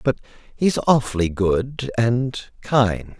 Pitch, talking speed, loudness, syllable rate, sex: 120 Hz, 115 wpm, -21 LUFS, 3.0 syllables/s, male